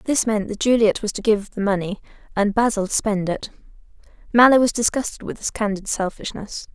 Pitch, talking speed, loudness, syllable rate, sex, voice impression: 210 Hz, 185 wpm, -20 LUFS, 5.6 syllables/s, female, very feminine, adult-like, fluent, slightly sincere, slightly elegant